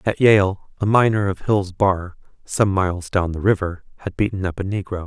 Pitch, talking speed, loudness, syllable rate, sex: 95 Hz, 200 wpm, -20 LUFS, 5.0 syllables/s, male